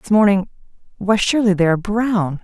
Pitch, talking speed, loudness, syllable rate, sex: 200 Hz, 150 wpm, -17 LUFS, 5.8 syllables/s, female